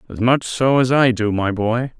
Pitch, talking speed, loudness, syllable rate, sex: 120 Hz, 240 wpm, -17 LUFS, 4.5 syllables/s, male